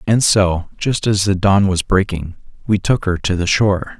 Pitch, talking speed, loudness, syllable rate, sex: 95 Hz, 210 wpm, -16 LUFS, 4.6 syllables/s, male